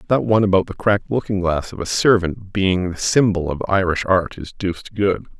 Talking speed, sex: 200 wpm, male